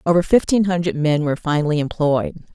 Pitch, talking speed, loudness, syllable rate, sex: 160 Hz, 165 wpm, -18 LUFS, 6.0 syllables/s, female